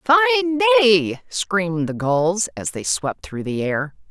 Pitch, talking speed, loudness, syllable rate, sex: 190 Hz, 160 wpm, -19 LUFS, 4.0 syllables/s, female